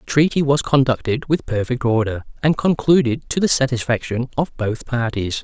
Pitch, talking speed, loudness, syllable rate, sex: 130 Hz, 165 wpm, -19 LUFS, 5.1 syllables/s, male